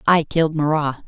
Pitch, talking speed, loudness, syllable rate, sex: 155 Hz, 165 wpm, -19 LUFS, 6.0 syllables/s, female